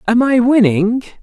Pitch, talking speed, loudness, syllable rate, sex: 230 Hz, 145 wpm, -13 LUFS, 4.4 syllables/s, male